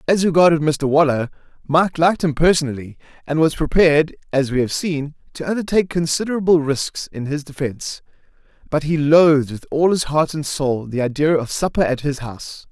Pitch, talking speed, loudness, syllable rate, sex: 150 Hz, 180 wpm, -18 LUFS, 5.6 syllables/s, male